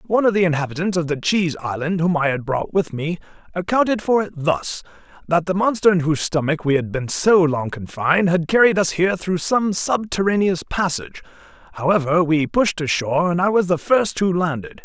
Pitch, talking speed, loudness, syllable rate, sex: 170 Hz, 200 wpm, -19 LUFS, 5.6 syllables/s, male